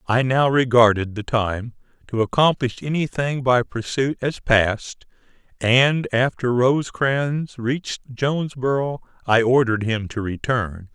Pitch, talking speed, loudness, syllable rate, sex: 125 Hz, 120 wpm, -20 LUFS, 4.1 syllables/s, male